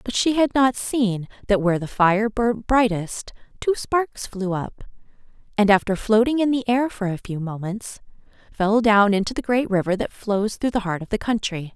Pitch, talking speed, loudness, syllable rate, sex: 215 Hz, 200 wpm, -21 LUFS, 4.8 syllables/s, female